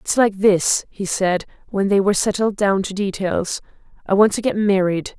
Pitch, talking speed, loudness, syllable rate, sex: 195 Hz, 195 wpm, -19 LUFS, 4.8 syllables/s, female